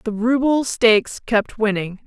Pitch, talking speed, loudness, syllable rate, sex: 225 Hz, 145 wpm, -18 LUFS, 4.0 syllables/s, female